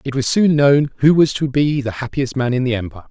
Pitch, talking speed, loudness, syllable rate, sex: 135 Hz, 270 wpm, -16 LUFS, 5.9 syllables/s, male